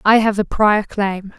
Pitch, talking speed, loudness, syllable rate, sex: 205 Hz, 215 wpm, -17 LUFS, 3.9 syllables/s, female